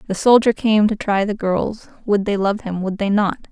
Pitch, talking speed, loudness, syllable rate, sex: 205 Hz, 240 wpm, -18 LUFS, 4.9 syllables/s, female